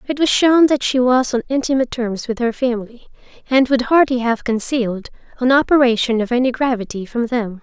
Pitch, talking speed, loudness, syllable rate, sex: 245 Hz, 190 wpm, -17 LUFS, 5.7 syllables/s, female